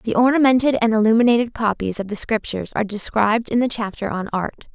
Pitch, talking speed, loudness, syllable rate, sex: 225 Hz, 190 wpm, -19 LUFS, 6.5 syllables/s, female